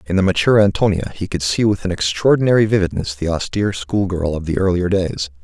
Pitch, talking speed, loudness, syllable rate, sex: 95 Hz, 200 wpm, -17 LUFS, 6.2 syllables/s, male